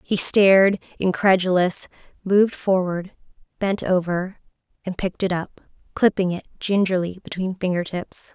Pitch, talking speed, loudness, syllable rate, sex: 185 Hz, 120 wpm, -21 LUFS, 4.7 syllables/s, female